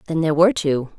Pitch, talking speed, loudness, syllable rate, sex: 160 Hz, 245 wpm, -18 LUFS, 8.1 syllables/s, female